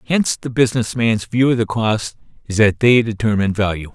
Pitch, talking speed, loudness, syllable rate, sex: 115 Hz, 200 wpm, -17 LUFS, 5.7 syllables/s, male